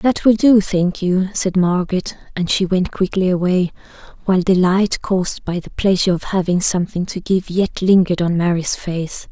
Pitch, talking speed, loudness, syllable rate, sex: 185 Hz, 185 wpm, -17 LUFS, 5.0 syllables/s, female